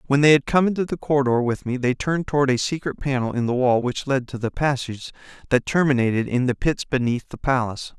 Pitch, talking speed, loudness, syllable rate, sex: 130 Hz, 235 wpm, -22 LUFS, 6.2 syllables/s, male